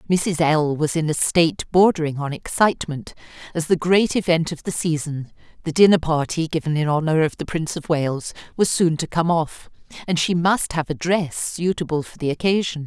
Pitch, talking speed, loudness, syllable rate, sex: 165 Hz, 195 wpm, -20 LUFS, 5.3 syllables/s, female